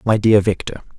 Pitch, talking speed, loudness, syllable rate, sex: 105 Hz, 180 wpm, -16 LUFS, 5.4 syllables/s, male